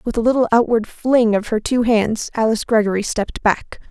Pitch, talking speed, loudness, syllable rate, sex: 225 Hz, 200 wpm, -18 LUFS, 5.5 syllables/s, female